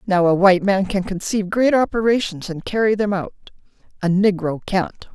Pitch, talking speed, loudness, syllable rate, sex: 195 Hz, 175 wpm, -19 LUFS, 5.4 syllables/s, female